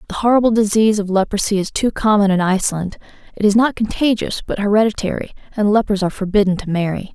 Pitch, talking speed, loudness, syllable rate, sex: 205 Hz, 185 wpm, -17 LUFS, 6.6 syllables/s, female